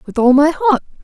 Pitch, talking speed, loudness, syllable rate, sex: 285 Hz, 230 wpm, -13 LUFS, 5.7 syllables/s, female